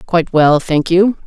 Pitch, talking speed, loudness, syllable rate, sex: 170 Hz, 190 wpm, -13 LUFS, 4.6 syllables/s, female